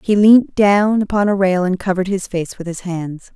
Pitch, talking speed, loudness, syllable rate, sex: 190 Hz, 235 wpm, -16 LUFS, 5.0 syllables/s, female